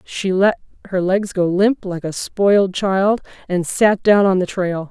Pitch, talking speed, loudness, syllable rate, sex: 190 Hz, 195 wpm, -17 LUFS, 4.0 syllables/s, female